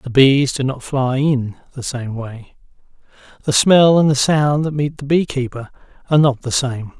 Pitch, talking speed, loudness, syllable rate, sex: 135 Hz, 190 wpm, -17 LUFS, 4.6 syllables/s, male